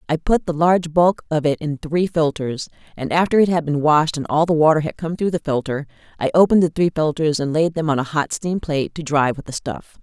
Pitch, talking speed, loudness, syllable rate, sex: 155 Hz, 255 wpm, -19 LUFS, 5.7 syllables/s, female